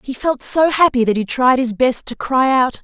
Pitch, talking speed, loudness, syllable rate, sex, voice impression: 260 Hz, 255 wpm, -16 LUFS, 4.8 syllables/s, female, very feminine, slightly adult-like, thin, slightly tensed, slightly powerful, bright, hard, very clear, very fluent, slightly raspy, cute, slightly intellectual, very refreshing, sincere, slightly calm, friendly, reassuring, very unique, elegant, slightly wild, sweet, very lively, strict, intense, light